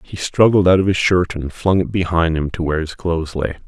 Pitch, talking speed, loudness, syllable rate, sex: 85 Hz, 260 wpm, -17 LUFS, 5.8 syllables/s, male